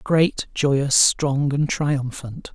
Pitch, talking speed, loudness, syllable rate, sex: 140 Hz, 120 wpm, -20 LUFS, 2.5 syllables/s, male